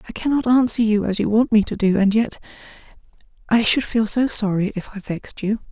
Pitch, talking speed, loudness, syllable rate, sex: 215 Hz, 220 wpm, -19 LUFS, 5.8 syllables/s, female